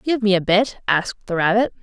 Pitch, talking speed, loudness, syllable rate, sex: 205 Hz, 230 wpm, -19 LUFS, 5.6 syllables/s, female